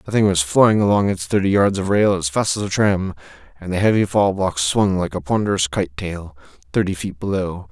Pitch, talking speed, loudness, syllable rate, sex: 95 Hz, 225 wpm, -19 LUFS, 5.2 syllables/s, male